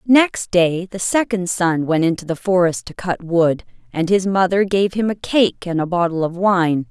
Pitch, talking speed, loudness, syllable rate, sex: 180 Hz, 210 wpm, -18 LUFS, 4.5 syllables/s, female